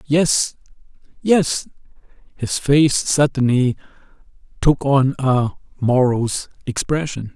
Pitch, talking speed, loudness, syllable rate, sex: 135 Hz, 80 wpm, -18 LUFS, 3.5 syllables/s, male